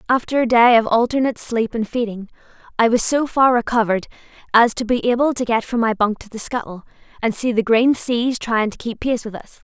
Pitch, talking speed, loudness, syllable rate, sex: 235 Hz, 225 wpm, -18 LUFS, 5.7 syllables/s, female